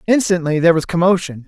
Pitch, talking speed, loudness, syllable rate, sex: 175 Hz, 165 wpm, -16 LUFS, 6.9 syllables/s, male